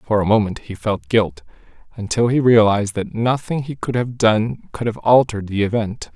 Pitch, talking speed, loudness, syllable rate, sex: 115 Hz, 195 wpm, -18 LUFS, 5.2 syllables/s, male